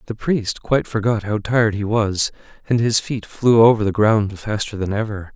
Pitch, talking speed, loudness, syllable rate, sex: 110 Hz, 200 wpm, -19 LUFS, 5.0 syllables/s, male